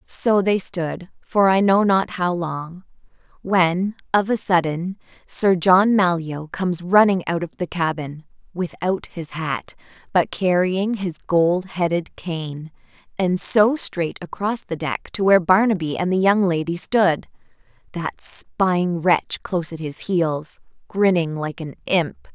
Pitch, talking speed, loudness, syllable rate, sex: 180 Hz, 150 wpm, -20 LUFS, 3.8 syllables/s, female